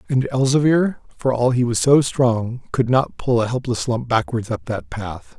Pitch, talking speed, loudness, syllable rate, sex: 120 Hz, 200 wpm, -19 LUFS, 4.5 syllables/s, male